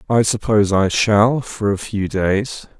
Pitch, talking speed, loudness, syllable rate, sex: 105 Hz, 170 wpm, -17 LUFS, 3.9 syllables/s, male